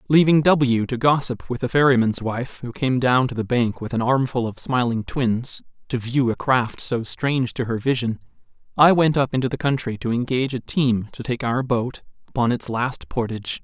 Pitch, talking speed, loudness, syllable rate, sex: 125 Hz, 205 wpm, -21 LUFS, 5.0 syllables/s, male